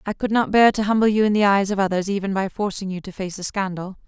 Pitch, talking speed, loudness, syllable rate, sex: 200 Hz, 295 wpm, -20 LUFS, 6.4 syllables/s, female